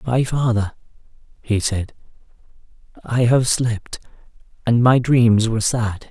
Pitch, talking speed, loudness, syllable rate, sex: 115 Hz, 120 wpm, -18 LUFS, 3.9 syllables/s, male